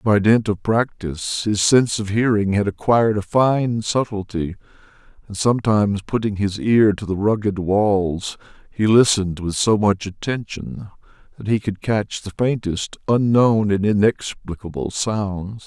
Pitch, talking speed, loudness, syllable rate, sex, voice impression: 105 Hz, 145 wpm, -19 LUFS, 4.4 syllables/s, male, very masculine, very adult-like, old, very thick, slightly relaxed, slightly weak, slightly dark, soft, muffled, fluent, cool, intellectual, very sincere, very calm, very mature, friendly, very reassuring, unique, elegant, very wild, sweet, slightly lively, very kind, slightly modest